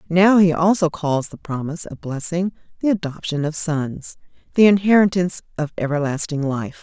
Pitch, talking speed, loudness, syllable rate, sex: 165 Hz, 150 wpm, -20 LUFS, 5.2 syllables/s, female